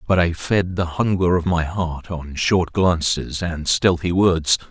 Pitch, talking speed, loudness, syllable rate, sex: 85 Hz, 180 wpm, -20 LUFS, 3.8 syllables/s, male